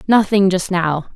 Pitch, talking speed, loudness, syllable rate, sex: 185 Hz, 155 wpm, -16 LUFS, 4.4 syllables/s, female